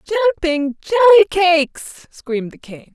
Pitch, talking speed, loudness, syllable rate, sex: 345 Hz, 100 wpm, -15 LUFS, 6.2 syllables/s, female